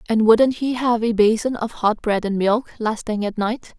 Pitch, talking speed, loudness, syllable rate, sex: 225 Hz, 240 wpm, -20 LUFS, 4.5 syllables/s, female